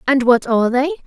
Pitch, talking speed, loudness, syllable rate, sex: 260 Hz, 225 wpm, -15 LUFS, 6.1 syllables/s, female